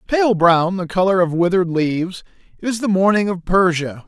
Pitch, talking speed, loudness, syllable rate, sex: 185 Hz, 175 wpm, -17 LUFS, 5.1 syllables/s, male